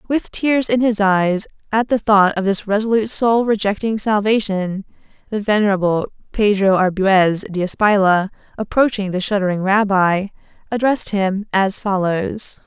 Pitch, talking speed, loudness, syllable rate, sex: 205 Hz, 130 wpm, -17 LUFS, 4.5 syllables/s, female